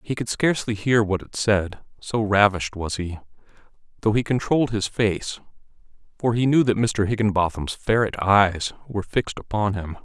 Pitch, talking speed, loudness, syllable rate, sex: 105 Hz, 165 wpm, -22 LUFS, 5.2 syllables/s, male